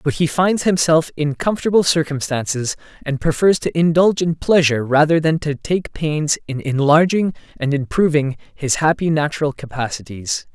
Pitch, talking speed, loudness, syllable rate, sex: 155 Hz, 150 wpm, -18 LUFS, 5.1 syllables/s, male